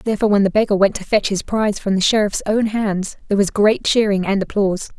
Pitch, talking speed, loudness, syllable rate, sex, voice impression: 205 Hz, 240 wpm, -17 LUFS, 6.5 syllables/s, female, feminine, adult-like, tensed, powerful, clear, fluent, intellectual, slightly friendly, elegant, lively, slightly strict, intense, sharp